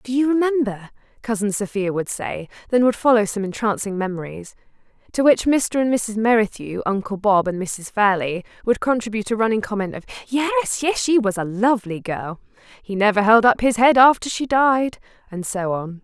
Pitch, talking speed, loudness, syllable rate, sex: 220 Hz, 185 wpm, -20 LUFS, 5.2 syllables/s, female